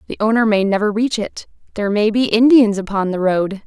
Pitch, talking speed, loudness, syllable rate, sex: 215 Hz, 215 wpm, -16 LUFS, 5.7 syllables/s, female